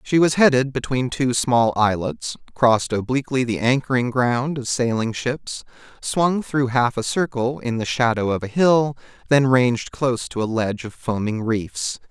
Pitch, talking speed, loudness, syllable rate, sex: 125 Hz, 175 wpm, -20 LUFS, 4.6 syllables/s, male